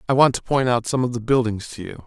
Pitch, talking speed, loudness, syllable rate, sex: 120 Hz, 320 wpm, -20 LUFS, 6.4 syllables/s, male